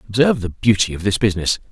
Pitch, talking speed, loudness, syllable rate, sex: 105 Hz, 210 wpm, -18 LUFS, 7.6 syllables/s, male